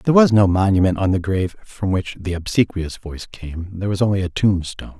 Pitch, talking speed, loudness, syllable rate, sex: 95 Hz, 215 wpm, -19 LUFS, 6.1 syllables/s, male